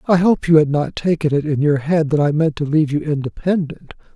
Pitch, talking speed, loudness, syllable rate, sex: 155 Hz, 245 wpm, -17 LUFS, 5.7 syllables/s, male